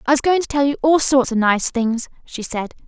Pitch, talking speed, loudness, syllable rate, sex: 260 Hz, 270 wpm, -17 LUFS, 5.3 syllables/s, female